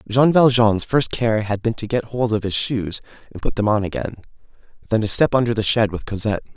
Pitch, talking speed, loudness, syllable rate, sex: 110 Hz, 230 wpm, -19 LUFS, 5.7 syllables/s, male